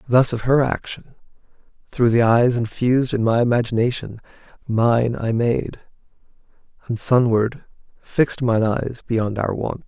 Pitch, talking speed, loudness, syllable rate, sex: 120 Hz, 135 wpm, -20 LUFS, 4.3 syllables/s, male